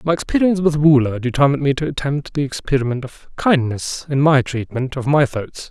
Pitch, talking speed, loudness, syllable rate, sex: 140 Hz, 190 wpm, -18 LUFS, 5.6 syllables/s, male